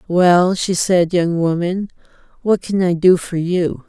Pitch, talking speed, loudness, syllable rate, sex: 180 Hz, 170 wpm, -16 LUFS, 3.8 syllables/s, female